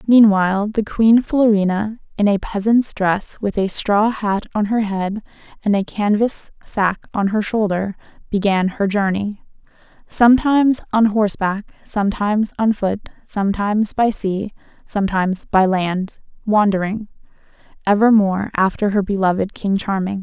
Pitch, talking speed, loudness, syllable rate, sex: 205 Hz, 130 wpm, -18 LUFS, 4.7 syllables/s, female